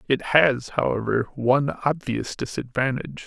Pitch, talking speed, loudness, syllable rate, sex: 130 Hz, 110 wpm, -23 LUFS, 4.7 syllables/s, male